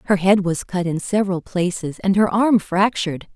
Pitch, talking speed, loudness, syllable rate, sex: 190 Hz, 195 wpm, -19 LUFS, 5.1 syllables/s, female